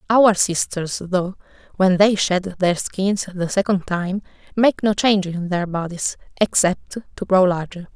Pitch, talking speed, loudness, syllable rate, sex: 190 Hz, 160 wpm, -19 LUFS, 4.1 syllables/s, female